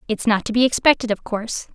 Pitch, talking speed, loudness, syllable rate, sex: 225 Hz, 240 wpm, -19 LUFS, 6.5 syllables/s, female